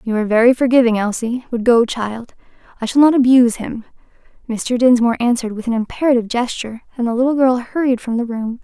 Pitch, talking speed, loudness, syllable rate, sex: 240 Hz, 195 wpm, -16 LUFS, 6.5 syllables/s, female